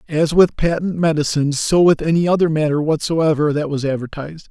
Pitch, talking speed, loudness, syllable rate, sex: 155 Hz, 175 wpm, -17 LUFS, 5.8 syllables/s, male